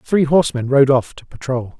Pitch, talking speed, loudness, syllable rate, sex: 135 Hz, 200 wpm, -16 LUFS, 5.3 syllables/s, male